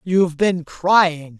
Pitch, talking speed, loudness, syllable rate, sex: 170 Hz, 130 wpm, -18 LUFS, 3.1 syllables/s, female